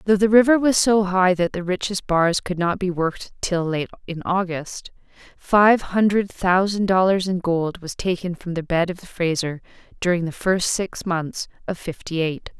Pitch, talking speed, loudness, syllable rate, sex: 180 Hz, 190 wpm, -21 LUFS, 4.6 syllables/s, female